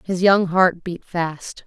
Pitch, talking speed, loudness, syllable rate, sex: 175 Hz, 180 wpm, -19 LUFS, 3.2 syllables/s, female